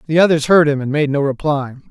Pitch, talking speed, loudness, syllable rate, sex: 145 Hz, 250 wpm, -15 LUFS, 6.4 syllables/s, male